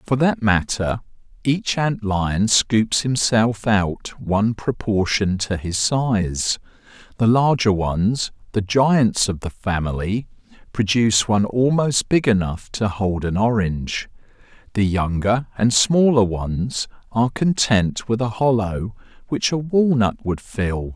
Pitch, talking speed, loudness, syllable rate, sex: 110 Hz, 130 wpm, -20 LUFS, 3.8 syllables/s, male